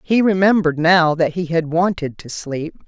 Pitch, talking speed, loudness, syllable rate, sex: 170 Hz, 190 wpm, -17 LUFS, 4.7 syllables/s, female